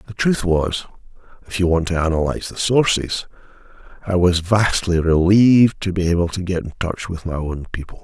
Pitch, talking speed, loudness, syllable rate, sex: 90 Hz, 170 wpm, -18 LUFS, 5.3 syllables/s, male